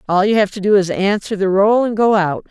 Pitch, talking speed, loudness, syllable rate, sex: 200 Hz, 290 wpm, -15 LUFS, 5.7 syllables/s, female